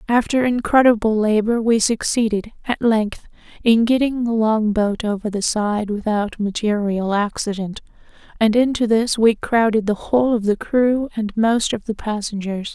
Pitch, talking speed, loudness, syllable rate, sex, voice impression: 220 Hz, 150 wpm, -19 LUFS, 4.5 syllables/s, female, feminine, adult-like, tensed, soft, slightly clear, intellectual, calm, friendly, reassuring, elegant, kind, slightly modest